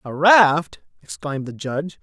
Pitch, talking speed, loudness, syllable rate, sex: 155 Hz, 150 wpm, -18 LUFS, 4.6 syllables/s, male